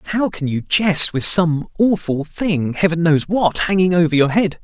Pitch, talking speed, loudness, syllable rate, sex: 170 Hz, 170 wpm, -17 LUFS, 4.5 syllables/s, male